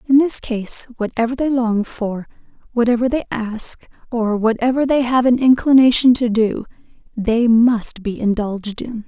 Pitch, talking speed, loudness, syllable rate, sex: 235 Hz, 150 wpm, -17 LUFS, 4.5 syllables/s, female